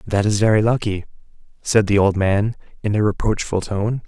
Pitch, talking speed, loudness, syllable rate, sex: 105 Hz, 175 wpm, -19 LUFS, 5.2 syllables/s, male